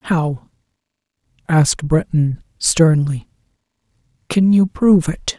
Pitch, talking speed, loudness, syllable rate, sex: 160 Hz, 90 wpm, -16 LUFS, 3.7 syllables/s, male